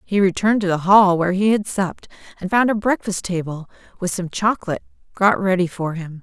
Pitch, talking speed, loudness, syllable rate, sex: 190 Hz, 200 wpm, -19 LUFS, 6.0 syllables/s, female